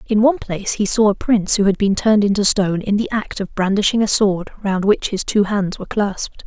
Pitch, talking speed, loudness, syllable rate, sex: 205 Hz, 250 wpm, -17 LUFS, 6.0 syllables/s, female